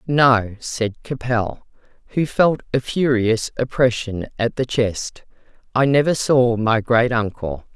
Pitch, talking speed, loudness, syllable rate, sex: 120 Hz, 130 wpm, -19 LUFS, 3.7 syllables/s, female